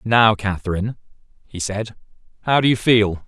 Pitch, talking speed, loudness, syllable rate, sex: 105 Hz, 130 wpm, -19 LUFS, 5.1 syllables/s, male